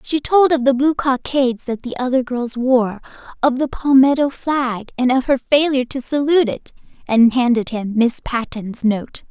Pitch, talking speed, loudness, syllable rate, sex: 255 Hz, 180 wpm, -17 LUFS, 4.7 syllables/s, female